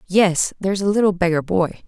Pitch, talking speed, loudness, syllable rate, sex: 185 Hz, 190 wpm, -19 LUFS, 5.4 syllables/s, female